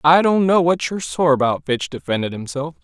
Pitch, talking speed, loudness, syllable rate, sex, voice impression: 150 Hz, 210 wpm, -18 LUFS, 5.6 syllables/s, male, masculine, adult-like, relaxed, slightly muffled, raspy, calm, mature, friendly, reassuring, wild, kind, modest